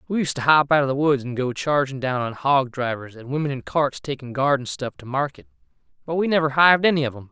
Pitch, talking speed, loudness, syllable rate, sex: 135 Hz, 255 wpm, -21 LUFS, 6.1 syllables/s, male